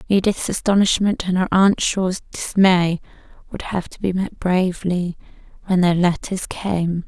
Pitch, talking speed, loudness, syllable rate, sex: 185 Hz, 145 wpm, -19 LUFS, 4.3 syllables/s, female